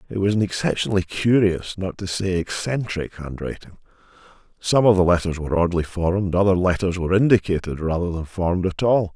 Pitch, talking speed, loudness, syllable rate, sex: 95 Hz, 165 wpm, -21 LUFS, 5.9 syllables/s, male